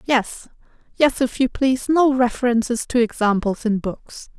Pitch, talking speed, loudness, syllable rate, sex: 240 Hz, 150 wpm, -19 LUFS, 4.6 syllables/s, female